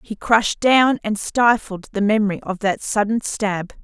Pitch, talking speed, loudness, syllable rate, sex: 210 Hz, 170 wpm, -19 LUFS, 4.6 syllables/s, female